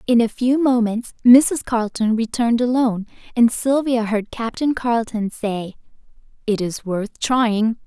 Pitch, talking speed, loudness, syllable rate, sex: 230 Hz, 135 wpm, -19 LUFS, 4.5 syllables/s, female